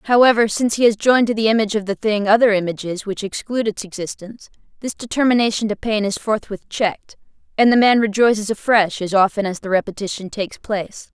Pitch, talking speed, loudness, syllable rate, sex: 215 Hz, 195 wpm, -18 LUFS, 6.3 syllables/s, female